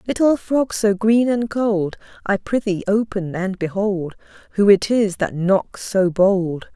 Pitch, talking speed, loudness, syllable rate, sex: 200 Hz, 160 wpm, -19 LUFS, 3.8 syllables/s, female